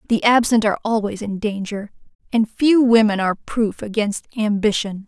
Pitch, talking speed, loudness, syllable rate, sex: 215 Hz, 155 wpm, -19 LUFS, 5.0 syllables/s, female